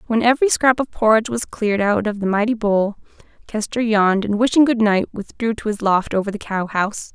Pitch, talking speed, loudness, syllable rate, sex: 215 Hz, 220 wpm, -18 LUFS, 5.9 syllables/s, female